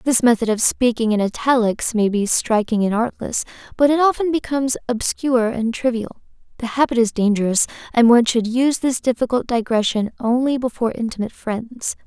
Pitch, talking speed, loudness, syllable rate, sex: 235 Hz, 165 wpm, -19 LUFS, 5.6 syllables/s, female